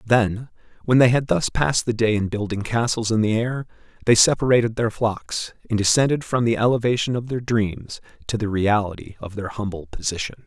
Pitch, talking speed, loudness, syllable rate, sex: 110 Hz, 190 wpm, -21 LUFS, 5.3 syllables/s, male